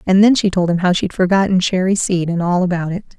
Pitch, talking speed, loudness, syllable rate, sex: 185 Hz, 265 wpm, -16 LUFS, 6.1 syllables/s, female